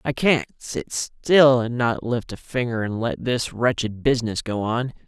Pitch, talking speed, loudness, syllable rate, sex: 120 Hz, 190 wpm, -22 LUFS, 4.2 syllables/s, male